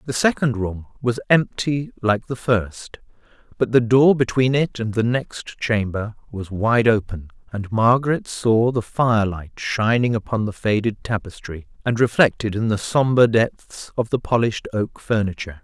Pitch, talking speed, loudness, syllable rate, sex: 115 Hz, 155 wpm, -20 LUFS, 4.5 syllables/s, male